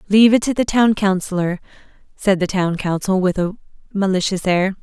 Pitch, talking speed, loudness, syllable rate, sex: 195 Hz, 175 wpm, -18 LUFS, 5.4 syllables/s, female